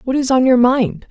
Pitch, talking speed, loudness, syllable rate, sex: 250 Hz, 270 wpm, -14 LUFS, 5.0 syllables/s, female